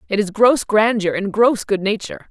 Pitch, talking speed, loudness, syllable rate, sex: 210 Hz, 210 wpm, -17 LUFS, 5.2 syllables/s, female